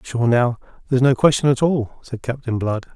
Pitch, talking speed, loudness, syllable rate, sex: 125 Hz, 205 wpm, -19 LUFS, 5.4 syllables/s, male